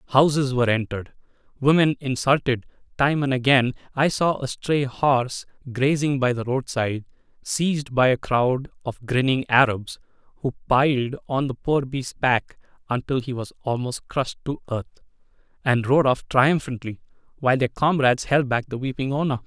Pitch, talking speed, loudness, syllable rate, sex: 130 Hz, 155 wpm, -22 LUFS, 5.2 syllables/s, male